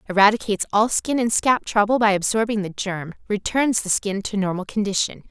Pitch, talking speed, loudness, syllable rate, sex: 210 Hz, 170 wpm, -21 LUFS, 5.6 syllables/s, female